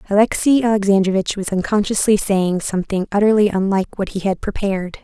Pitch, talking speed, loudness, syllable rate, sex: 200 Hz, 145 wpm, -17 LUFS, 6.1 syllables/s, female